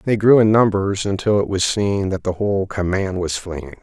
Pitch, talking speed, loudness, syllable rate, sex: 100 Hz, 220 wpm, -18 LUFS, 5.0 syllables/s, male